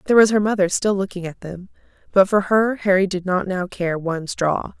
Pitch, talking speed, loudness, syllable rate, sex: 190 Hz, 225 wpm, -19 LUFS, 5.5 syllables/s, female